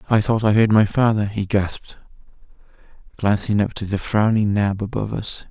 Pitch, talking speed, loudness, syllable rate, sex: 105 Hz, 175 wpm, -20 LUFS, 5.4 syllables/s, male